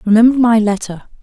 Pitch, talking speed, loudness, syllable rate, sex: 220 Hz, 145 wpm, -12 LUFS, 5.9 syllables/s, female